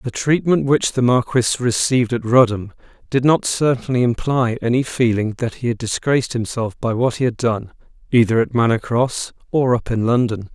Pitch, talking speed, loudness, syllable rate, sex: 120 Hz, 180 wpm, -18 LUFS, 5.1 syllables/s, male